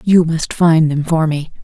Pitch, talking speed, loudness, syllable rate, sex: 160 Hz, 220 wpm, -14 LUFS, 4.2 syllables/s, female